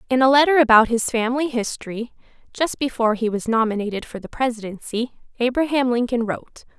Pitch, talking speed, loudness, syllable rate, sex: 240 Hz, 160 wpm, -20 LUFS, 6.1 syllables/s, female